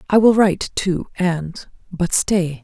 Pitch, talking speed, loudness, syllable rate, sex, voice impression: 180 Hz, 135 wpm, -18 LUFS, 3.8 syllables/s, female, feminine, adult-like, slightly hard, clear, fluent, intellectual, elegant, slightly strict, sharp